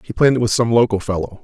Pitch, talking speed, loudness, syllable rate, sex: 110 Hz, 290 wpm, -17 LUFS, 7.5 syllables/s, male